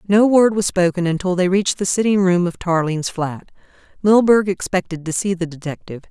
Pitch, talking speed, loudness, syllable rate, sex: 185 Hz, 185 wpm, -18 LUFS, 5.6 syllables/s, female